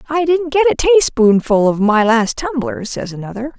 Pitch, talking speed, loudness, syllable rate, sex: 260 Hz, 185 wpm, -15 LUFS, 5.0 syllables/s, female